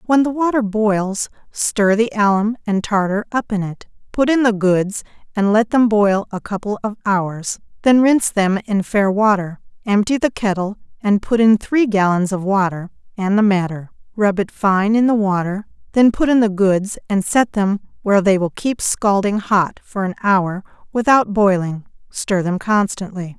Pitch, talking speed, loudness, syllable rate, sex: 205 Hz, 175 wpm, -17 LUFS, 4.5 syllables/s, female